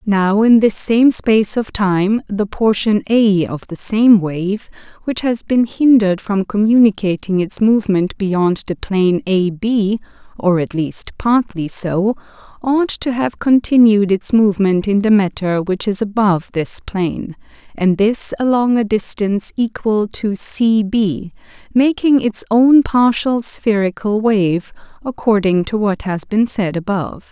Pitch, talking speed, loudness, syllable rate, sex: 210 Hz, 150 wpm, -15 LUFS, 4.1 syllables/s, female